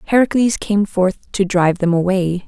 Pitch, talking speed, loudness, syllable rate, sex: 190 Hz, 170 wpm, -17 LUFS, 4.9 syllables/s, female